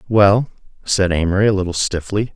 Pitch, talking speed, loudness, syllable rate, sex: 100 Hz, 155 wpm, -17 LUFS, 5.4 syllables/s, male